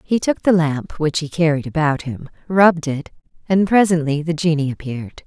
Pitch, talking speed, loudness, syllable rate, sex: 160 Hz, 180 wpm, -18 LUFS, 5.2 syllables/s, female